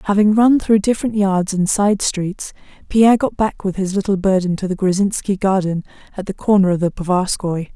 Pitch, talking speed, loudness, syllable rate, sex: 195 Hz, 195 wpm, -17 LUFS, 5.4 syllables/s, female